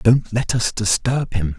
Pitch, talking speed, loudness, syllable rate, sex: 115 Hz, 190 wpm, -19 LUFS, 3.9 syllables/s, male